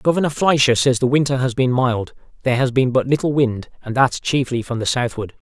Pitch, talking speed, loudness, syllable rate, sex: 130 Hz, 220 wpm, -18 LUFS, 5.7 syllables/s, male